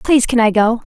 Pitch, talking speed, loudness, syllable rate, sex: 235 Hz, 265 wpm, -14 LUFS, 6.8 syllables/s, female